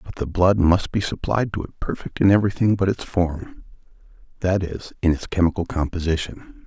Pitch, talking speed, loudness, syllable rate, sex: 90 Hz, 170 wpm, -22 LUFS, 5.3 syllables/s, male